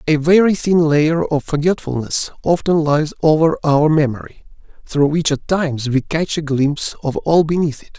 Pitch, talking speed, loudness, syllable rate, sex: 155 Hz, 175 wpm, -16 LUFS, 4.8 syllables/s, male